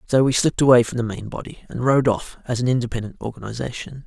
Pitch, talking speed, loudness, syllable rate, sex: 120 Hz, 220 wpm, -21 LUFS, 6.7 syllables/s, male